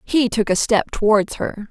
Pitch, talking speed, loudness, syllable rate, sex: 215 Hz, 210 wpm, -18 LUFS, 4.4 syllables/s, female